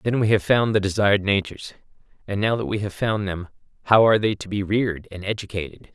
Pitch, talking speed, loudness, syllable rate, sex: 100 Hz, 220 wpm, -22 LUFS, 6.3 syllables/s, male